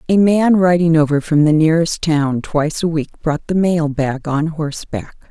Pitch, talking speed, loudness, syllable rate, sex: 160 Hz, 190 wpm, -16 LUFS, 4.9 syllables/s, female